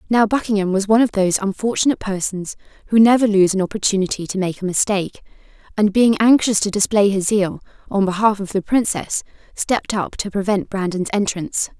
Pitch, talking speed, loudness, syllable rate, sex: 200 Hz, 180 wpm, -18 LUFS, 6.0 syllables/s, female